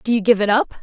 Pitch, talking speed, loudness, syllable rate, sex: 215 Hz, 365 wpm, -17 LUFS, 6.3 syllables/s, female